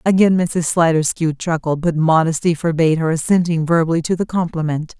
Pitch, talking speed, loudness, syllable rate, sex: 165 Hz, 155 wpm, -17 LUFS, 5.5 syllables/s, female